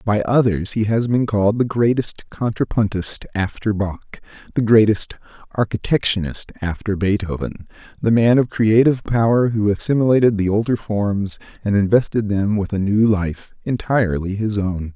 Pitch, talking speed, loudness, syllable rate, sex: 105 Hz, 145 wpm, -19 LUFS, 5.0 syllables/s, male